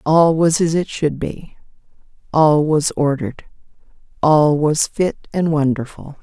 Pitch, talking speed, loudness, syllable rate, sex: 150 Hz, 115 wpm, -17 LUFS, 3.9 syllables/s, female